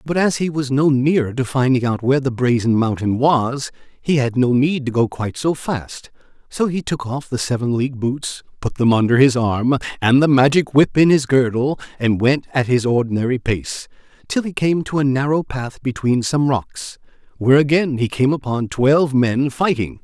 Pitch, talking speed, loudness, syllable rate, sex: 130 Hz, 200 wpm, -18 LUFS, 4.9 syllables/s, male